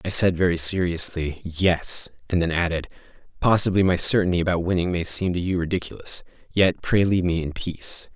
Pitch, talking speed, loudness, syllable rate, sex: 90 Hz, 175 wpm, -22 LUFS, 5.6 syllables/s, male